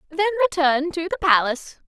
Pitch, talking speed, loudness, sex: 325 Hz, 160 wpm, -20 LUFS, female